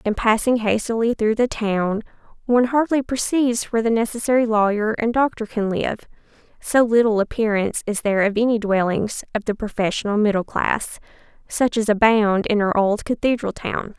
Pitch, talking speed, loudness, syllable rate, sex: 220 Hz, 165 wpm, -20 LUFS, 5.3 syllables/s, female